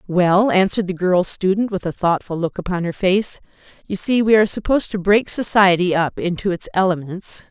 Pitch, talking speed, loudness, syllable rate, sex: 190 Hz, 190 wpm, -18 LUFS, 5.5 syllables/s, female